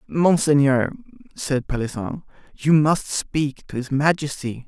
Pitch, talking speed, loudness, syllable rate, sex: 140 Hz, 115 wpm, -21 LUFS, 3.9 syllables/s, male